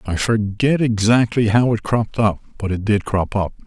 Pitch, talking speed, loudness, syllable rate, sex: 110 Hz, 195 wpm, -18 LUFS, 4.9 syllables/s, male